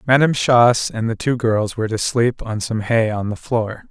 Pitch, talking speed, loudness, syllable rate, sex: 115 Hz, 230 wpm, -18 LUFS, 4.9 syllables/s, male